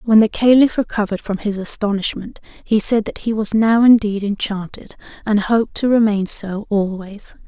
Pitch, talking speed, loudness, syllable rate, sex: 210 Hz, 170 wpm, -17 LUFS, 5.0 syllables/s, female